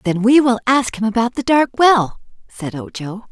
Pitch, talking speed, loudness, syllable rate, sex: 230 Hz, 200 wpm, -16 LUFS, 4.9 syllables/s, female